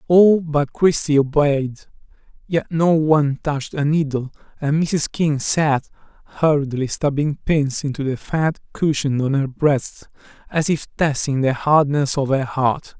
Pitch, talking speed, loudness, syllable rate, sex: 145 Hz, 150 wpm, -19 LUFS, 4.1 syllables/s, male